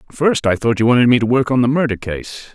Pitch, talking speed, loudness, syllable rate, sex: 120 Hz, 285 wpm, -16 LUFS, 5.9 syllables/s, male